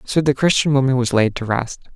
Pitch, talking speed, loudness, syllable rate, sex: 130 Hz, 245 wpm, -18 LUFS, 5.8 syllables/s, male